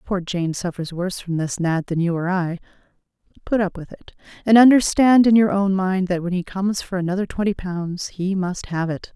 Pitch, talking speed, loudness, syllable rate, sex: 185 Hz, 215 wpm, -20 LUFS, 5.2 syllables/s, female